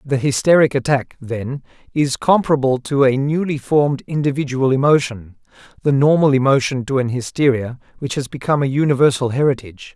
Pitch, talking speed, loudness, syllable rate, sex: 135 Hz, 145 wpm, -17 LUFS, 5.7 syllables/s, male